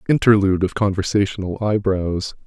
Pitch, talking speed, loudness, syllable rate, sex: 100 Hz, 95 wpm, -19 LUFS, 5.5 syllables/s, male